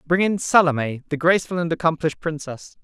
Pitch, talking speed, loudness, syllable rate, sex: 160 Hz, 170 wpm, -21 LUFS, 6.2 syllables/s, male